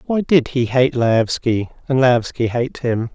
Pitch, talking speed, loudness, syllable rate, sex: 125 Hz, 170 wpm, -18 LUFS, 3.9 syllables/s, male